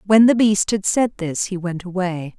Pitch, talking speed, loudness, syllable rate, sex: 190 Hz, 225 wpm, -19 LUFS, 4.6 syllables/s, female